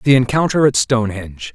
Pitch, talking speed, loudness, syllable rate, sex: 120 Hz, 155 wpm, -15 LUFS, 6.0 syllables/s, male